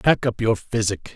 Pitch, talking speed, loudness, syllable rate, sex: 110 Hz, 205 wpm, -22 LUFS, 4.6 syllables/s, male